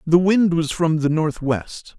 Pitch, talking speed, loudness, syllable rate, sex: 165 Hz, 180 wpm, -19 LUFS, 3.7 syllables/s, male